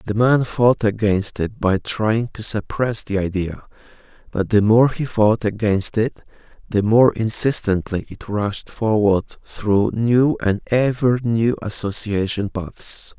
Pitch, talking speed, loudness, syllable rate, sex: 110 Hz, 140 wpm, -19 LUFS, 3.8 syllables/s, male